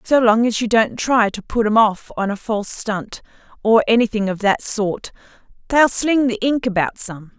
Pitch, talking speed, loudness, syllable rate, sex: 225 Hz, 205 wpm, -18 LUFS, 4.7 syllables/s, female